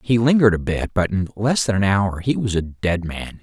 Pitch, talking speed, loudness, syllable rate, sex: 100 Hz, 260 wpm, -20 LUFS, 5.3 syllables/s, male